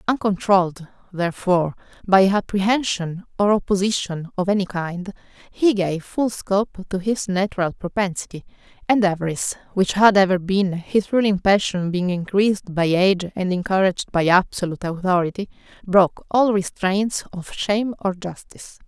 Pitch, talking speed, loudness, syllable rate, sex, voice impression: 190 Hz, 135 wpm, -20 LUFS, 5.1 syllables/s, female, very feminine, young, slightly adult-like, thin, slightly relaxed, slightly weak, dark, hard, clear, slightly fluent, slightly raspy, cool, intellectual, refreshing, slightly sincere, calm, slightly friendly, reassuring, unique, wild, slightly sweet, slightly lively, kind, slightly modest